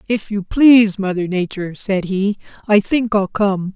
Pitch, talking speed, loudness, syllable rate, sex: 200 Hz, 175 wpm, -16 LUFS, 4.6 syllables/s, female